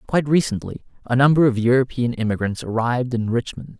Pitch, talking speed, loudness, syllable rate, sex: 125 Hz, 160 wpm, -20 LUFS, 6.1 syllables/s, male